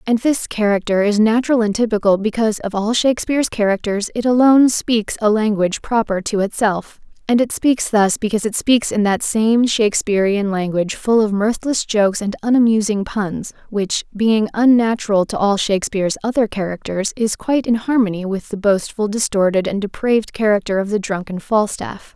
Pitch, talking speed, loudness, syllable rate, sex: 215 Hz, 170 wpm, -17 LUFS, 5.4 syllables/s, female